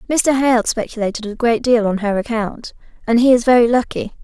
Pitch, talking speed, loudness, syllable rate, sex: 230 Hz, 200 wpm, -16 LUFS, 5.5 syllables/s, female